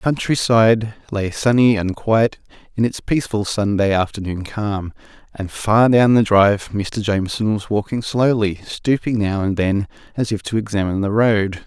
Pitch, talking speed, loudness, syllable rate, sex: 105 Hz, 165 wpm, -18 LUFS, 4.8 syllables/s, male